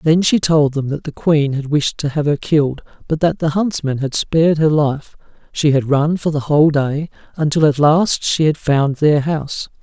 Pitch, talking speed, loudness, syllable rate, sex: 150 Hz, 220 wpm, -16 LUFS, 4.8 syllables/s, male